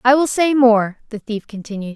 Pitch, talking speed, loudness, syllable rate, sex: 235 Hz, 215 wpm, -17 LUFS, 5.0 syllables/s, female